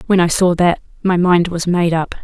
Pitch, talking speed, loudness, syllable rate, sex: 175 Hz, 240 wpm, -15 LUFS, 5.0 syllables/s, female